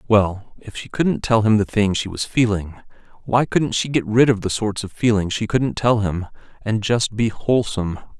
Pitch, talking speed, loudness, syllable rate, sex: 110 Hz, 210 wpm, -20 LUFS, 4.8 syllables/s, male